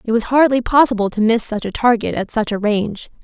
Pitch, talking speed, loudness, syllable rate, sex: 225 Hz, 240 wpm, -16 LUFS, 5.9 syllables/s, female